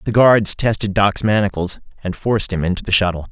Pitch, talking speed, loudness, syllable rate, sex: 100 Hz, 200 wpm, -17 LUFS, 5.8 syllables/s, male